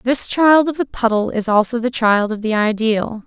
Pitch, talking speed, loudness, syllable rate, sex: 230 Hz, 220 wpm, -16 LUFS, 4.8 syllables/s, female